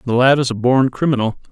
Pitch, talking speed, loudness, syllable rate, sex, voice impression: 125 Hz, 240 wpm, -16 LUFS, 6.2 syllables/s, male, masculine, very adult-like, slightly thick, cool, intellectual, slightly sweet